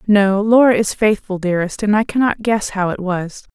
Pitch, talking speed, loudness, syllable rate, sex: 205 Hz, 205 wpm, -16 LUFS, 5.1 syllables/s, female